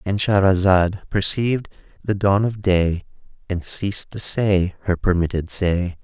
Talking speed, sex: 140 wpm, male